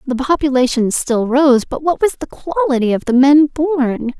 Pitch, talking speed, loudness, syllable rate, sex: 275 Hz, 185 wpm, -14 LUFS, 4.5 syllables/s, female